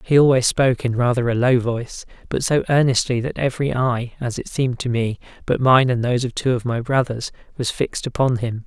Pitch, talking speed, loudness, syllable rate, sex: 125 Hz, 220 wpm, -20 LUFS, 5.8 syllables/s, male